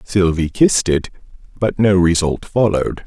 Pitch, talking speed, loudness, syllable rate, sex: 95 Hz, 135 wpm, -16 LUFS, 4.7 syllables/s, male